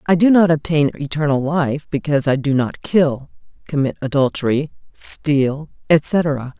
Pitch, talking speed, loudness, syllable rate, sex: 145 Hz, 135 wpm, -18 LUFS, 4.3 syllables/s, female